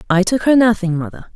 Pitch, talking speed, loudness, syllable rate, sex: 200 Hz, 220 wpm, -15 LUFS, 6.1 syllables/s, female